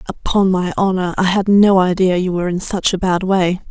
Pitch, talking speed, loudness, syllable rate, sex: 185 Hz, 225 wpm, -15 LUFS, 5.3 syllables/s, female